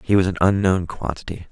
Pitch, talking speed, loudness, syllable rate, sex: 90 Hz, 200 wpm, -20 LUFS, 5.8 syllables/s, male